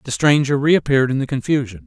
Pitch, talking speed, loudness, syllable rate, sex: 130 Hz, 195 wpm, -17 LUFS, 6.3 syllables/s, male